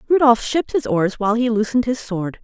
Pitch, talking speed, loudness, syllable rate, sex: 235 Hz, 220 wpm, -19 LUFS, 6.3 syllables/s, female